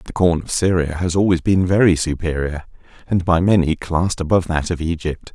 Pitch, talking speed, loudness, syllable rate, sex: 85 Hz, 190 wpm, -18 LUFS, 5.5 syllables/s, male